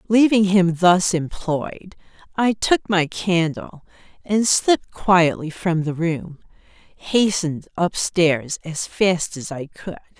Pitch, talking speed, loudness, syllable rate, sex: 175 Hz, 130 wpm, -20 LUFS, 3.4 syllables/s, female